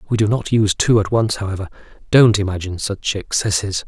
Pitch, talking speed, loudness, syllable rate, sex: 105 Hz, 185 wpm, -18 LUFS, 6.2 syllables/s, male